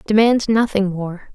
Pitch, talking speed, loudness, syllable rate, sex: 205 Hz, 135 wpm, -17 LUFS, 4.1 syllables/s, female